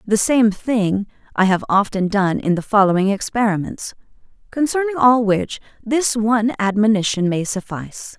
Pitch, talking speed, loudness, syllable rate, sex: 215 Hz, 140 wpm, -18 LUFS, 4.8 syllables/s, female